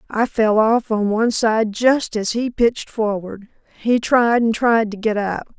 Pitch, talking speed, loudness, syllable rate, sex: 225 Hz, 195 wpm, -18 LUFS, 4.2 syllables/s, female